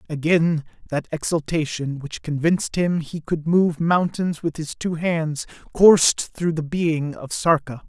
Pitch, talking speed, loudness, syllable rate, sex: 160 Hz, 150 wpm, -21 LUFS, 4.1 syllables/s, male